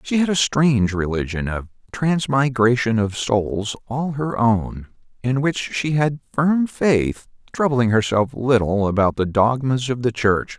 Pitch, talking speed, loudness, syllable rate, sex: 120 Hz, 155 wpm, -20 LUFS, 4.0 syllables/s, male